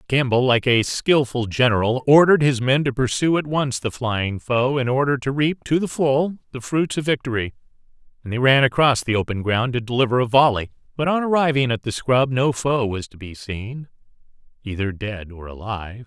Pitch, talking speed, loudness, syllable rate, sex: 125 Hz, 200 wpm, -20 LUFS, 5.2 syllables/s, male